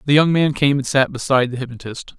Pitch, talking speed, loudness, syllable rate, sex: 135 Hz, 245 wpm, -18 LUFS, 6.4 syllables/s, male